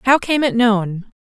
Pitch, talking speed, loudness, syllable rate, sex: 230 Hz, 195 wpm, -16 LUFS, 4.1 syllables/s, female